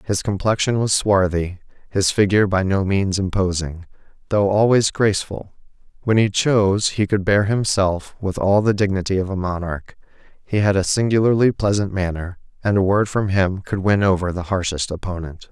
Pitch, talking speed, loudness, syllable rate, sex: 100 Hz, 170 wpm, -19 LUFS, 5.1 syllables/s, male